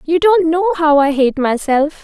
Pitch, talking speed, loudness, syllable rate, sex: 315 Hz, 205 wpm, -14 LUFS, 4.5 syllables/s, female